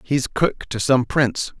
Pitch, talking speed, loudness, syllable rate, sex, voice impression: 130 Hz, 190 wpm, -20 LUFS, 4.1 syllables/s, male, masculine, middle-aged, thick, slightly muffled, slightly calm, slightly wild